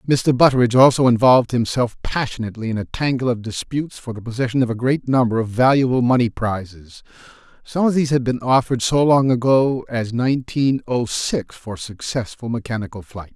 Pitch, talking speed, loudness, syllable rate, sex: 125 Hz, 175 wpm, -18 LUFS, 5.7 syllables/s, male